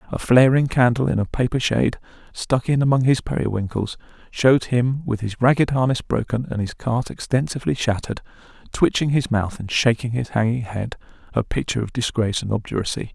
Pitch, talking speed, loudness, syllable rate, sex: 120 Hz, 175 wpm, -21 LUFS, 5.8 syllables/s, male